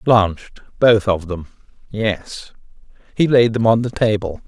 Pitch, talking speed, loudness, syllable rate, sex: 105 Hz, 150 wpm, -17 LUFS, 4.4 syllables/s, male